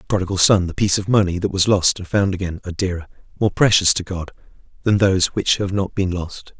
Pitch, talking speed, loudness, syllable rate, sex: 95 Hz, 235 wpm, -18 LUFS, 6.2 syllables/s, male